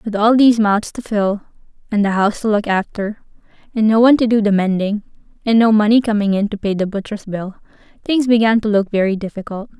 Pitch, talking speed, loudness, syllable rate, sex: 210 Hz, 215 wpm, -16 LUFS, 6.0 syllables/s, female